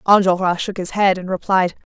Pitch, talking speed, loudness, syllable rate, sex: 190 Hz, 185 wpm, -18 LUFS, 5.3 syllables/s, female